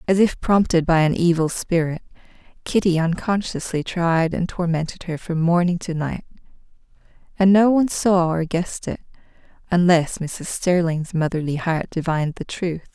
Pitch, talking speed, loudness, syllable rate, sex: 170 Hz, 150 wpm, -20 LUFS, 4.9 syllables/s, female